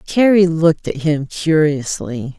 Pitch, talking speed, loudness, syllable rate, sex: 160 Hz, 125 wpm, -16 LUFS, 4.0 syllables/s, female